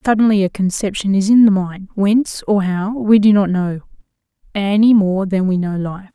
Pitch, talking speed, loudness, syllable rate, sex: 200 Hz, 195 wpm, -15 LUFS, 5.0 syllables/s, female